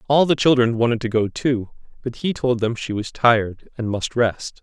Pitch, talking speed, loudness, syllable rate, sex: 120 Hz, 220 wpm, -20 LUFS, 4.9 syllables/s, male